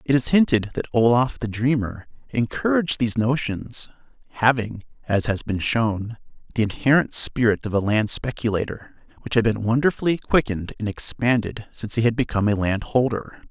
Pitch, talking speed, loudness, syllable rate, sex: 115 Hz, 155 wpm, -22 LUFS, 5.4 syllables/s, male